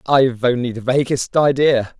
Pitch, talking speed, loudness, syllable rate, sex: 130 Hz, 150 wpm, -17 LUFS, 4.9 syllables/s, male